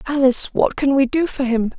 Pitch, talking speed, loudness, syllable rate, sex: 265 Hz, 235 wpm, -18 LUFS, 5.8 syllables/s, female